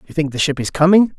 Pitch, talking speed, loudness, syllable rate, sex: 160 Hz, 305 wpm, -16 LUFS, 6.9 syllables/s, male